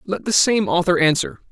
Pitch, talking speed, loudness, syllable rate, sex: 175 Hz, 200 wpm, -18 LUFS, 5.3 syllables/s, male